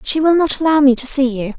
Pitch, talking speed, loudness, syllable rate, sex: 280 Hz, 305 wpm, -14 LUFS, 6.1 syllables/s, female